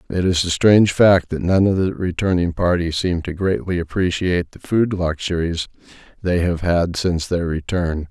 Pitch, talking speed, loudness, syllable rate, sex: 90 Hz, 180 wpm, -19 LUFS, 4.9 syllables/s, male